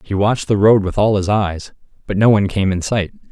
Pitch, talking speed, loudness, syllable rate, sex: 100 Hz, 255 wpm, -16 LUFS, 5.9 syllables/s, male